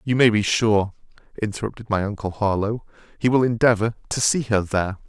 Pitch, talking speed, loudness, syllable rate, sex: 110 Hz, 175 wpm, -21 LUFS, 6.0 syllables/s, male